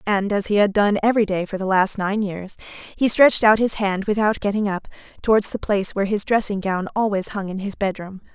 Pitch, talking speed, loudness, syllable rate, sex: 200 Hz, 230 wpm, -20 LUFS, 5.7 syllables/s, female